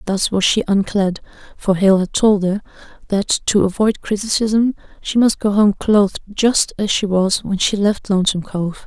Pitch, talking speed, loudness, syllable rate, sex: 200 Hz, 185 wpm, -17 LUFS, 4.7 syllables/s, female